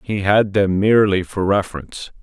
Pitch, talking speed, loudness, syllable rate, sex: 100 Hz, 160 wpm, -17 LUFS, 5.3 syllables/s, male